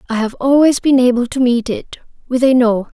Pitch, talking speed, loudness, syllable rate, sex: 250 Hz, 220 wpm, -14 LUFS, 5.4 syllables/s, female